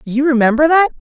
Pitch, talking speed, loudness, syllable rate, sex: 275 Hz, 165 wpm, -13 LUFS, 6.1 syllables/s, female